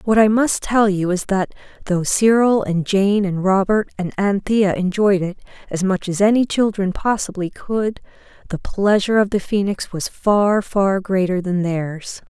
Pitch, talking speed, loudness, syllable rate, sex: 195 Hz, 170 wpm, -18 LUFS, 4.3 syllables/s, female